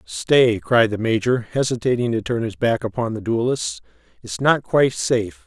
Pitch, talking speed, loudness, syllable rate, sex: 120 Hz, 175 wpm, -20 LUFS, 4.8 syllables/s, male